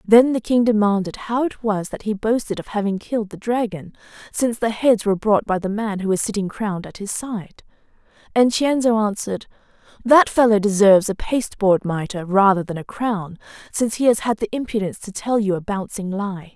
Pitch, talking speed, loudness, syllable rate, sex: 210 Hz, 200 wpm, -20 LUFS, 5.5 syllables/s, female